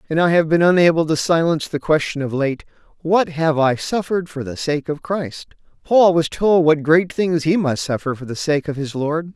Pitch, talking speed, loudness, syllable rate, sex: 160 Hz, 225 wpm, -18 LUFS, 5.1 syllables/s, male